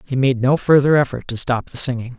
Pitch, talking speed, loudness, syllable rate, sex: 130 Hz, 250 wpm, -17 LUFS, 5.7 syllables/s, male